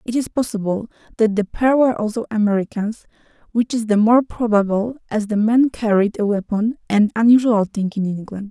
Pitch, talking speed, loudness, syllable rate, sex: 220 Hz, 170 wpm, -18 LUFS, 5.4 syllables/s, female